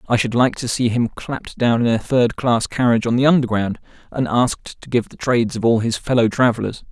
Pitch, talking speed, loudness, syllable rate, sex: 120 Hz, 235 wpm, -18 LUFS, 5.8 syllables/s, male